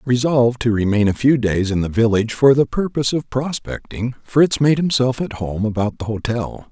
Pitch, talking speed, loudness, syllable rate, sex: 120 Hz, 195 wpm, -18 LUFS, 5.2 syllables/s, male